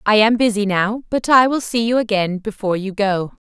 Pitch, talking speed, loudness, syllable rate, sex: 215 Hz, 225 wpm, -17 LUFS, 5.4 syllables/s, female